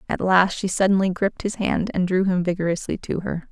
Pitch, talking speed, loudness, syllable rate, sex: 185 Hz, 220 wpm, -22 LUFS, 5.7 syllables/s, female